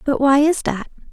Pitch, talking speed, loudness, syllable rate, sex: 280 Hz, 215 wpm, -17 LUFS, 4.9 syllables/s, female